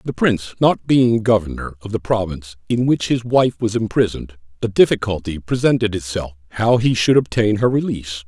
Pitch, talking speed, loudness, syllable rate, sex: 110 Hz, 175 wpm, -18 LUFS, 5.6 syllables/s, male